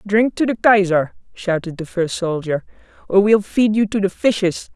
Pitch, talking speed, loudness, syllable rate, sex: 195 Hz, 190 wpm, -18 LUFS, 4.7 syllables/s, female